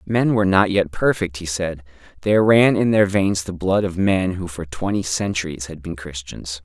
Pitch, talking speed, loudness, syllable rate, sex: 90 Hz, 210 wpm, -20 LUFS, 4.9 syllables/s, male